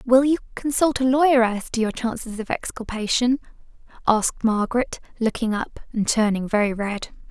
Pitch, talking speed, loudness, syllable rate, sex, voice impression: 235 Hz, 155 wpm, -22 LUFS, 5.3 syllables/s, female, very feminine, young, very thin, slightly relaxed, weak, bright, soft, slightly clear, fluent, slightly raspy, cute, slightly cool, very intellectual, very refreshing, sincere, slightly calm, very friendly, very reassuring, very unique, very elegant, slightly wild, very sweet, lively, kind, slightly sharp, slightly modest, light